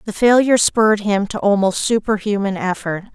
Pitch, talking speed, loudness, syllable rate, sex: 205 Hz, 170 wpm, -17 LUFS, 5.5 syllables/s, female